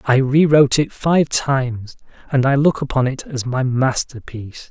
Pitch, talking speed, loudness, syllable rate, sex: 135 Hz, 165 wpm, -17 LUFS, 4.7 syllables/s, male